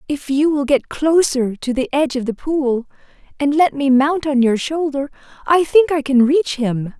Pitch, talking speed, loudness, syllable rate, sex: 280 Hz, 205 wpm, -17 LUFS, 4.6 syllables/s, female